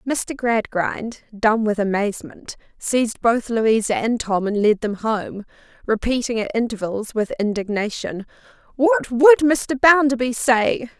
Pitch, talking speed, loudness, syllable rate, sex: 225 Hz, 130 wpm, -19 LUFS, 4.1 syllables/s, female